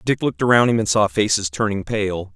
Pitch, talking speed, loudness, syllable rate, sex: 105 Hz, 230 wpm, -19 LUFS, 5.8 syllables/s, male